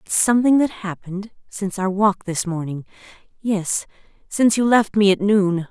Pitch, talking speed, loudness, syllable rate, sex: 200 Hz, 160 wpm, -19 LUFS, 5.1 syllables/s, female